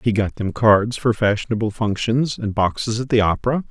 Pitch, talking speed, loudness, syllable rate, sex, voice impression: 110 Hz, 195 wpm, -19 LUFS, 5.3 syllables/s, male, masculine, adult-like, tensed, powerful, bright, clear, fluent, cool, intellectual, friendly, reassuring, wild, slightly kind